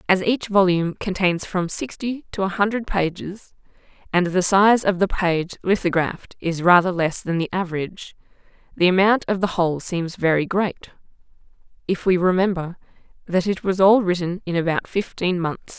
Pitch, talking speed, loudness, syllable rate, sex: 185 Hz, 165 wpm, -21 LUFS, 5.0 syllables/s, female